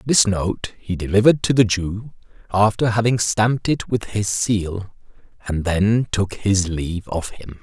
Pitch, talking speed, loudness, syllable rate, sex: 100 Hz, 165 wpm, -20 LUFS, 4.3 syllables/s, male